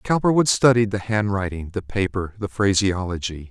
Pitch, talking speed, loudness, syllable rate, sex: 100 Hz, 135 wpm, -21 LUFS, 5.0 syllables/s, male